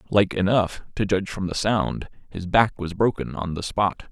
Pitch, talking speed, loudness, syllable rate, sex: 95 Hz, 205 wpm, -23 LUFS, 4.9 syllables/s, male